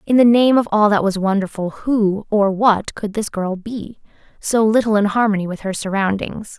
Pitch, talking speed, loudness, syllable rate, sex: 210 Hz, 200 wpm, -17 LUFS, 4.9 syllables/s, female